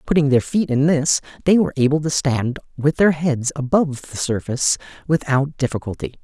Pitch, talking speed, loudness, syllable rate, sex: 140 Hz, 175 wpm, -19 LUFS, 5.5 syllables/s, male